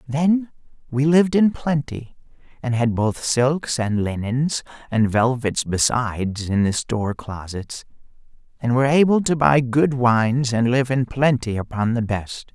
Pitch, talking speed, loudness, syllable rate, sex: 125 Hz, 155 wpm, -20 LUFS, 4.3 syllables/s, male